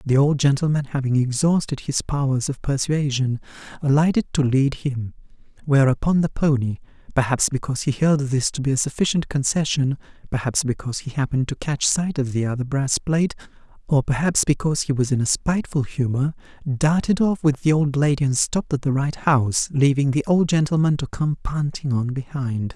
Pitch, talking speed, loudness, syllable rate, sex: 140 Hz, 180 wpm, -21 LUFS, 5.5 syllables/s, male